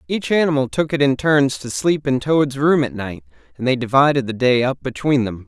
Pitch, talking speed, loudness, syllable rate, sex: 135 Hz, 230 wpm, -18 LUFS, 5.3 syllables/s, male